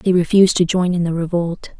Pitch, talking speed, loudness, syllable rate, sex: 175 Hz, 235 wpm, -17 LUFS, 6.0 syllables/s, female